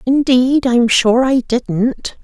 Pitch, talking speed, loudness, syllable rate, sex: 250 Hz, 135 wpm, -14 LUFS, 2.9 syllables/s, female